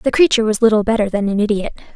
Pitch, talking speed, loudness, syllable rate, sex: 220 Hz, 245 wpm, -15 LUFS, 7.6 syllables/s, female